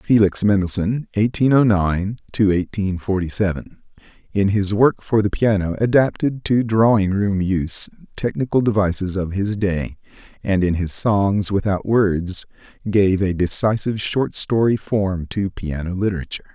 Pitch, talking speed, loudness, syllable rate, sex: 100 Hz, 145 wpm, -19 LUFS, 4.0 syllables/s, male